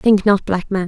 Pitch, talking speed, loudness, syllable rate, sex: 195 Hz, 275 wpm, -16 LUFS, 4.6 syllables/s, female